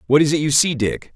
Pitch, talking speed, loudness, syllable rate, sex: 145 Hz, 310 wpm, -17 LUFS, 6.1 syllables/s, male